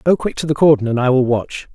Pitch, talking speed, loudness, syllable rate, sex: 135 Hz, 310 wpm, -16 LUFS, 6.3 syllables/s, male